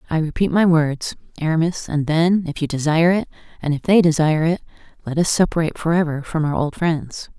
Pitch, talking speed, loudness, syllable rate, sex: 160 Hz, 195 wpm, -19 LUFS, 5.9 syllables/s, female